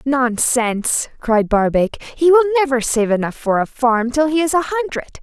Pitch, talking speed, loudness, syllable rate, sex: 255 Hz, 185 wpm, -17 LUFS, 4.8 syllables/s, female